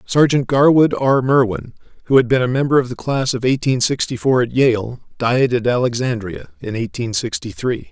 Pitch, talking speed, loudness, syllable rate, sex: 125 Hz, 190 wpm, -17 LUFS, 5.0 syllables/s, male